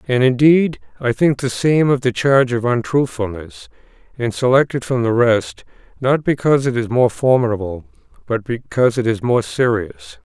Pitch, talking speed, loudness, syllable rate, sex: 125 Hz, 170 wpm, -17 LUFS, 5.0 syllables/s, male